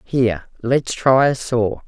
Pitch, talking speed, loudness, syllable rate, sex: 120 Hz, 160 wpm, -18 LUFS, 3.7 syllables/s, female